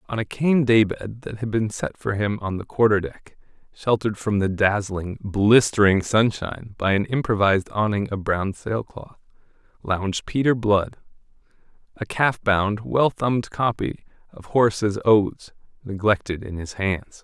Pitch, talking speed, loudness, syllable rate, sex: 105 Hz, 155 wpm, -22 LUFS, 4.5 syllables/s, male